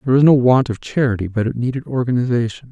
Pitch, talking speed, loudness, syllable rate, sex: 125 Hz, 220 wpm, -17 LUFS, 7.0 syllables/s, male